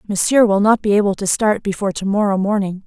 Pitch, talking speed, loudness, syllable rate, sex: 200 Hz, 230 wpm, -16 LUFS, 6.3 syllables/s, female